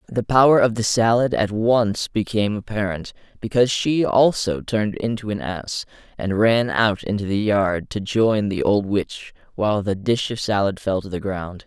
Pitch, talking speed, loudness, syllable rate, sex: 105 Hz, 185 wpm, -20 LUFS, 4.7 syllables/s, male